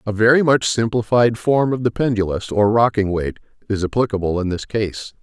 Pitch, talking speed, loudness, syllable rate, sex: 110 Hz, 185 wpm, -18 LUFS, 5.2 syllables/s, male